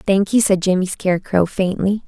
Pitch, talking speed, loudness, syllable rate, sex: 190 Hz, 175 wpm, -17 LUFS, 5.0 syllables/s, female